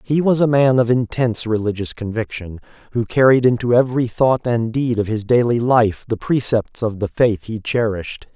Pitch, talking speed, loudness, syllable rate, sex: 115 Hz, 185 wpm, -18 LUFS, 5.1 syllables/s, male